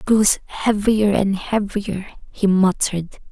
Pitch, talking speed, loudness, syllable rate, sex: 200 Hz, 125 wpm, -19 LUFS, 3.8 syllables/s, female